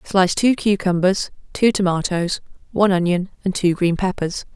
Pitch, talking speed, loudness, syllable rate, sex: 185 Hz, 145 wpm, -19 LUFS, 5.1 syllables/s, female